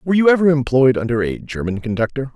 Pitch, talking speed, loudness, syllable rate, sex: 130 Hz, 205 wpm, -17 LUFS, 6.5 syllables/s, male